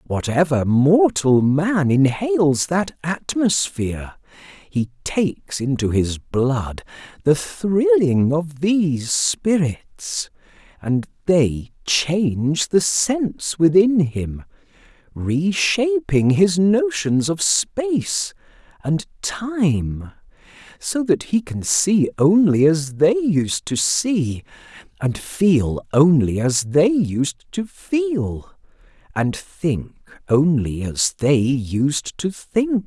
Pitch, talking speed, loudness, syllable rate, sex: 160 Hz, 100 wpm, -19 LUFS, 3.0 syllables/s, male